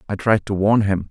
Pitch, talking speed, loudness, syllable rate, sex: 100 Hz, 270 wpm, -18 LUFS, 5.4 syllables/s, male